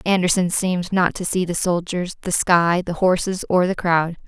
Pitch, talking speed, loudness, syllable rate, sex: 180 Hz, 195 wpm, -20 LUFS, 4.8 syllables/s, female